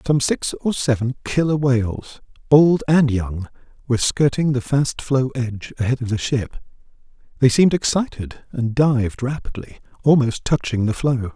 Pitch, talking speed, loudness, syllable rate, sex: 125 Hz, 155 wpm, -19 LUFS, 4.8 syllables/s, male